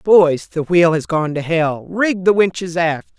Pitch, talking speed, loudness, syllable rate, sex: 170 Hz, 190 wpm, -16 LUFS, 4.0 syllables/s, female